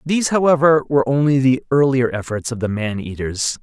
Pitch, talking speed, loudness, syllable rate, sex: 130 Hz, 180 wpm, -17 LUFS, 5.6 syllables/s, male